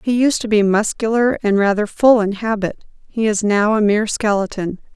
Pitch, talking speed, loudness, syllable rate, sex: 215 Hz, 195 wpm, -17 LUFS, 5.1 syllables/s, female